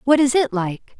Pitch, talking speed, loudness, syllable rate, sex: 250 Hz, 240 wpm, -19 LUFS, 4.7 syllables/s, female